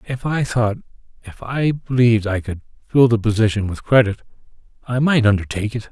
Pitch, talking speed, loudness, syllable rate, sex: 115 Hz, 150 wpm, -18 LUFS, 5.7 syllables/s, male